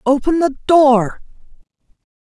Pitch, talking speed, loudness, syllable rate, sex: 280 Hz, 80 wpm, -14 LUFS, 4.0 syllables/s, female